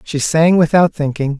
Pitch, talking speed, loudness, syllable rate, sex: 155 Hz, 170 wpm, -14 LUFS, 4.7 syllables/s, male